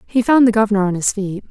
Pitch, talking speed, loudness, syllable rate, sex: 210 Hz, 280 wpm, -15 LUFS, 6.7 syllables/s, female